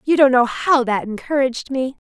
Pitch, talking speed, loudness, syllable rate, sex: 260 Hz, 200 wpm, -18 LUFS, 5.3 syllables/s, female